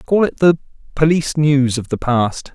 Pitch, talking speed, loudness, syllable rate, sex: 145 Hz, 190 wpm, -16 LUFS, 4.7 syllables/s, male